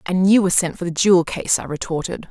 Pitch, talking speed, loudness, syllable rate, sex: 180 Hz, 260 wpm, -18 LUFS, 6.4 syllables/s, female